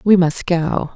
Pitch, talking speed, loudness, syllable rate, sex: 175 Hz, 190 wpm, -17 LUFS, 3.6 syllables/s, female